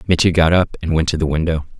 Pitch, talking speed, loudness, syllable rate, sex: 80 Hz, 265 wpm, -17 LUFS, 6.7 syllables/s, male